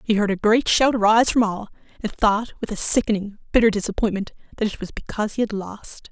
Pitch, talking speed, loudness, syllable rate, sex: 210 Hz, 215 wpm, -21 LUFS, 6.2 syllables/s, female